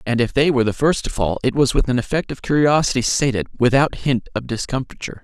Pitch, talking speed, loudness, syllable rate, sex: 130 Hz, 230 wpm, -19 LUFS, 6.4 syllables/s, male